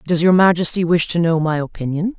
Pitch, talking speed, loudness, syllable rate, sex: 170 Hz, 220 wpm, -16 LUFS, 5.9 syllables/s, female